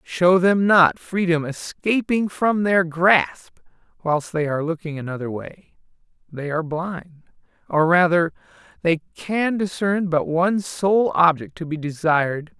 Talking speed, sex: 150 wpm, male